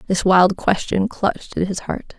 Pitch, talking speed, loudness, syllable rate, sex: 190 Hz, 190 wpm, -19 LUFS, 4.5 syllables/s, female